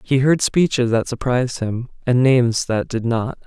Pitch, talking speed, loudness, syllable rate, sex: 125 Hz, 190 wpm, -19 LUFS, 4.8 syllables/s, male